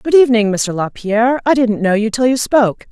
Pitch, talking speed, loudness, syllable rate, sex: 230 Hz, 245 wpm, -14 LUFS, 6.2 syllables/s, female